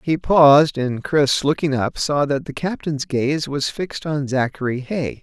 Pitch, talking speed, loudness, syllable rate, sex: 145 Hz, 185 wpm, -19 LUFS, 4.3 syllables/s, male